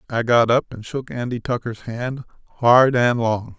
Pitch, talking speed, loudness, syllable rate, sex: 120 Hz, 185 wpm, -20 LUFS, 4.3 syllables/s, male